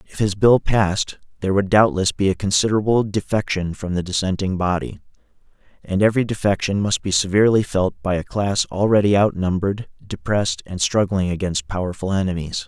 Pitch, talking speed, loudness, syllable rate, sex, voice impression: 95 Hz, 155 wpm, -20 LUFS, 5.8 syllables/s, male, very masculine, very adult-like, middle-aged, very thick, very tensed, very powerful, slightly dark, hard, muffled, fluent, slightly raspy, cool, very intellectual, refreshing, sincere, very calm, very mature, very friendly, very reassuring, very unique, elegant, very wild, sweet, slightly lively, kind, slightly modest